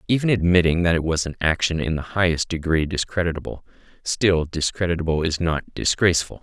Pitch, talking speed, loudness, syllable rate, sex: 85 Hz, 160 wpm, -21 LUFS, 5.8 syllables/s, male